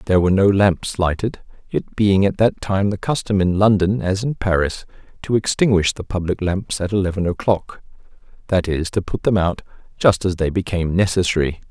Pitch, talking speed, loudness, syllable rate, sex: 95 Hz, 180 wpm, -19 LUFS, 5.4 syllables/s, male